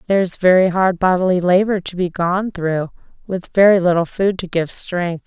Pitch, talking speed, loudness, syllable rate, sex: 180 Hz, 195 wpm, -17 LUFS, 5.1 syllables/s, female